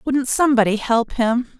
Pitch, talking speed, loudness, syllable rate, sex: 245 Hz, 150 wpm, -18 LUFS, 4.8 syllables/s, female